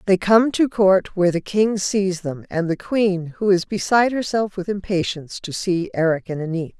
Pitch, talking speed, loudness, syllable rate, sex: 190 Hz, 205 wpm, -20 LUFS, 5.1 syllables/s, female